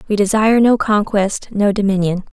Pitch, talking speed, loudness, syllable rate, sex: 205 Hz, 155 wpm, -15 LUFS, 5.4 syllables/s, female